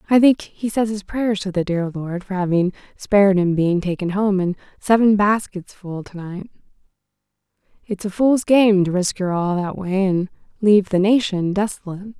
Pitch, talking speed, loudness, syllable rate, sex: 195 Hz, 180 wpm, -19 LUFS, 5.0 syllables/s, female